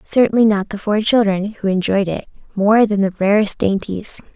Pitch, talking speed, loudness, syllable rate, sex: 205 Hz, 180 wpm, -16 LUFS, 4.9 syllables/s, female